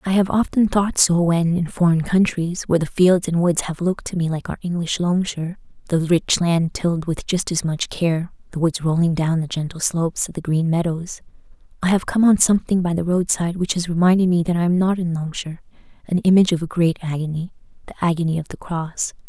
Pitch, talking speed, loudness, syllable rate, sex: 170 Hz, 210 wpm, -20 LUFS, 5.8 syllables/s, female